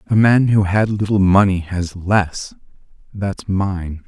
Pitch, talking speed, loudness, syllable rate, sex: 95 Hz, 135 wpm, -17 LUFS, 3.6 syllables/s, male